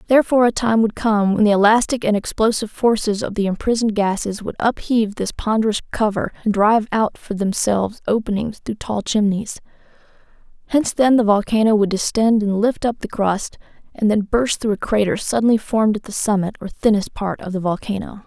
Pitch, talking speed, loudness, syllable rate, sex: 215 Hz, 185 wpm, -19 LUFS, 5.8 syllables/s, female